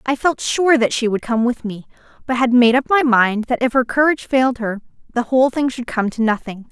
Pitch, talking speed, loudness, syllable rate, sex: 245 Hz, 250 wpm, -17 LUFS, 5.7 syllables/s, female